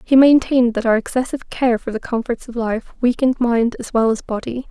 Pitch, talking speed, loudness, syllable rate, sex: 240 Hz, 215 wpm, -18 LUFS, 5.9 syllables/s, female